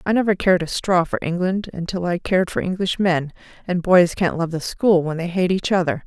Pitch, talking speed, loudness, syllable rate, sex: 175 Hz, 230 wpm, -20 LUFS, 5.6 syllables/s, female